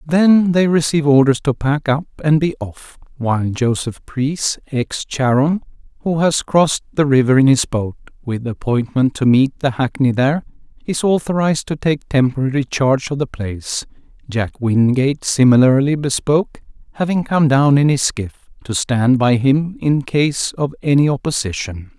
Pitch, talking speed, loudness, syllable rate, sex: 140 Hz, 160 wpm, -16 LUFS, 4.8 syllables/s, male